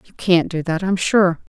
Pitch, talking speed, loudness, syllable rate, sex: 180 Hz, 225 wpm, -18 LUFS, 4.5 syllables/s, female